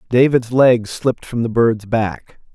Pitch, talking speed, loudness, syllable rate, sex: 115 Hz, 165 wpm, -16 LUFS, 4.0 syllables/s, male